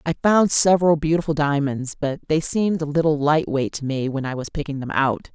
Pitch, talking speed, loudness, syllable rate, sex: 150 Hz, 225 wpm, -21 LUFS, 5.6 syllables/s, female